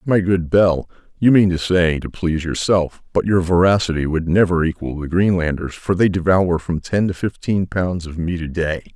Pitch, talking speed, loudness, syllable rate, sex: 90 Hz, 210 wpm, -18 LUFS, 4.9 syllables/s, male